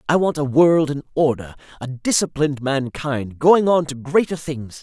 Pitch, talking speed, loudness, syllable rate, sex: 145 Hz, 175 wpm, -19 LUFS, 4.7 syllables/s, male